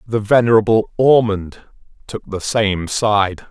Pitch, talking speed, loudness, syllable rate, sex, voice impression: 105 Hz, 120 wpm, -16 LUFS, 3.8 syllables/s, male, very masculine, very adult-like, middle-aged, very thick, very tensed, powerful, bright, hard, clear, fluent, cool, intellectual, slightly refreshing, very sincere, very calm, very mature, friendly, reassuring, slightly unique, wild, slightly sweet, slightly lively, kind